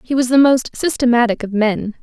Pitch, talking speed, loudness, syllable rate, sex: 245 Hz, 205 wpm, -15 LUFS, 5.4 syllables/s, female